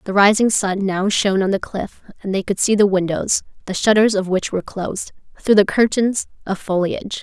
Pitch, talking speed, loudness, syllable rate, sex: 200 Hz, 210 wpm, -18 LUFS, 5.5 syllables/s, female